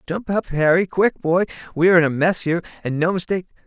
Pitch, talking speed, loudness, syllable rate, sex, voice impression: 175 Hz, 230 wpm, -19 LUFS, 6.7 syllables/s, male, masculine, adult-like, weak, soft, halting, cool, slightly refreshing, friendly, reassuring, kind, modest